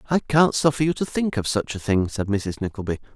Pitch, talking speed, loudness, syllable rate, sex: 125 Hz, 245 wpm, -23 LUFS, 5.8 syllables/s, male